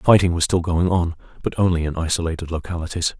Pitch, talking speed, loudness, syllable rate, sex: 85 Hz, 190 wpm, -21 LUFS, 6.3 syllables/s, male